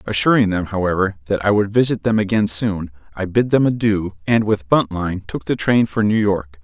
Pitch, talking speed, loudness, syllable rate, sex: 100 Hz, 210 wpm, -18 LUFS, 5.3 syllables/s, male